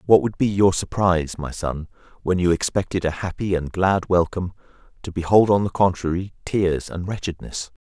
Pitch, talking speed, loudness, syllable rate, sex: 90 Hz, 175 wpm, -22 LUFS, 5.3 syllables/s, male